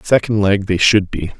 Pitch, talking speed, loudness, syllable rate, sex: 100 Hz, 170 wpm, -15 LUFS, 4.6 syllables/s, male